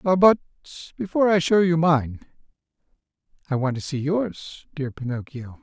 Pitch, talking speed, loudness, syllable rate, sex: 155 Hz, 140 wpm, -22 LUFS, 4.9 syllables/s, male